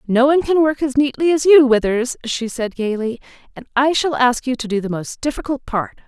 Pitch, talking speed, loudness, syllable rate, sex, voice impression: 255 Hz, 225 wpm, -17 LUFS, 5.4 syllables/s, female, feminine, adult-like, slightly powerful, slightly friendly, slightly unique, slightly intense